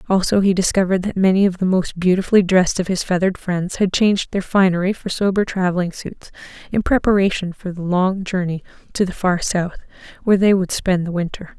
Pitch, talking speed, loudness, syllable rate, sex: 185 Hz, 195 wpm, -18 LUFS, 6.0 syllables/s, female